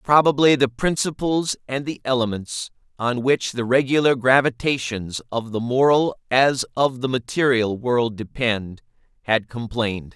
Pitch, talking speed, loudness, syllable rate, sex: 125 Hz, 130 wpm, -21 LUFS, 4.4 syllables/s, male